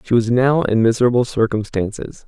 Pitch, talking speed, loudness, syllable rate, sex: 115 Hz, 160 wpm, -17 LUFS, 5.5 syllables/s, male